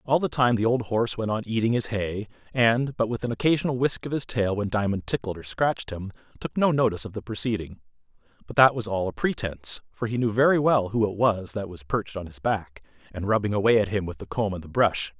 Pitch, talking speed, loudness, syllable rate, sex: 110 Hz, 250 wpm, -25 LUFS, 6.0 syllables/s, male